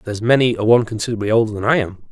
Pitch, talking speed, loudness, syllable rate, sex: 110 Hz, 255 wpm, -17 LUFS, 8.7 syllables/s, male